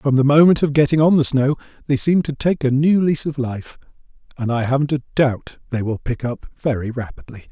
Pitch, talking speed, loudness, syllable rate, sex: 135 Hz, 225 wpm, -18 LUFS, 5.7 syllables/s, male